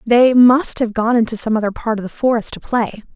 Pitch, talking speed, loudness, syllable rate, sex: 230 Hz, 245 wpm, -16 LUFS, 5.5 syllables/s, female